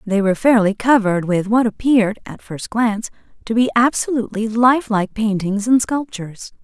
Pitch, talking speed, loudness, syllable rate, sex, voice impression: 220 Hz, 155 wpm, -17 LUFS, 5.7 syllables/s, female, feminine, adult-like, tensed, powerful, bright, soft, clear, fluent, intellectual, slightly refreshing, calm, friendly, reassuring, elegant, kind